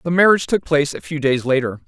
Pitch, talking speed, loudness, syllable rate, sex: 150 Hz, 255 wpm, -18 LUFS, 6.9 syllables/s, male